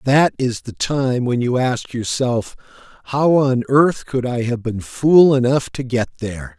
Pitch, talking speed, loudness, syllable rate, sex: 130 Hz, 180 wpm, -18 LUFS, 4.1 syllables/s, male